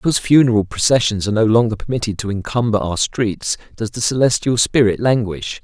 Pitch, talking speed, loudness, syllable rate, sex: 110 Hz, 170 wpm, -17 LUFS, 5.9 syllables/s, male